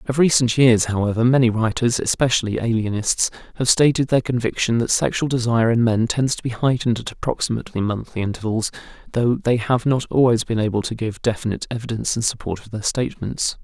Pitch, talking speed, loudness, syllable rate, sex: 120 Hz, 180 wpm, -20 LUFS, 6.2 syllables/s, male